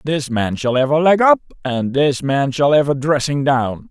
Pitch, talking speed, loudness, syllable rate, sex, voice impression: 140 Hz, 230 wpm, -16 LUFS, 4.5 syllables/s, male, masculine, old, slightly tensed, powerful, halting, raspy, mature, friendly, wild, lively, strict, intense, sharp